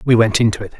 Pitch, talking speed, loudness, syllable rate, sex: 110 Hz, 305 wpm, -15 LUFS, 7.7 syllables/s, male